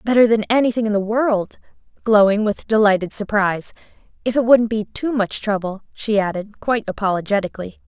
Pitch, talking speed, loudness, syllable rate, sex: 215 Hz, 160 wpm, -19 LUFS, 5.8 syllables/s, female